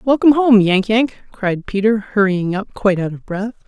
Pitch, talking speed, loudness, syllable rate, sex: 210 Hz, 195 wpm, -16 LUFS, 4.9 syllables/s, female